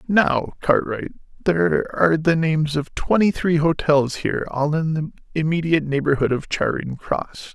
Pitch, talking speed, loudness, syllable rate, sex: 150 Hz, 150 wpm, -21 LUFS, 4.7 syllables/s, male